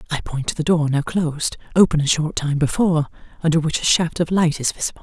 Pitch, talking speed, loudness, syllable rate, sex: 160 Hz, 240 wpm, -19 LUFS, 6.4 syllables/s, female